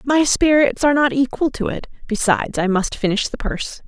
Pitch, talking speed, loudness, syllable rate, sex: 245 Hz, 200 wpm, -18 LUFS, 5.7 syllables/s, female